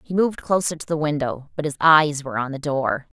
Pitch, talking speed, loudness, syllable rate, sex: 150 Hz, 245 wpm, -21 LUFS, 5.8 syllables/s, female